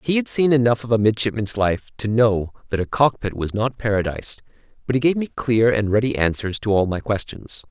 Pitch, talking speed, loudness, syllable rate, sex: 110 Hz, 220 wpm, -20 LUFS, 5.6 syllables/s, male